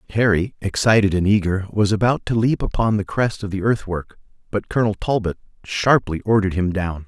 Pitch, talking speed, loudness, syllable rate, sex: 100 Hz, 180 wpm, -20 LUFS, 5.6 syllables/s, male